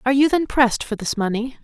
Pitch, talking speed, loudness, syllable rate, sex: 250 Hz, 255 wpm, -19 LUFS, 6.8 syllables/s, female